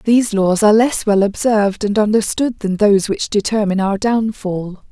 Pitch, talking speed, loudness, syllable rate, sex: 210 Hz, 170 wpm, -16 LUFS, 5.2 syllables/s, female